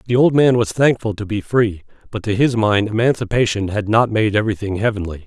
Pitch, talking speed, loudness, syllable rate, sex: 110 Hz, 205 wpm, -17 LUFS, 5.8 syllables/s, male